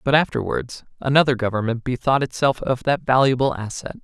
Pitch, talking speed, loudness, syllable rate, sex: 130 Hz, 150 wpm, -20 LUFS, 5.6 syllables/s, male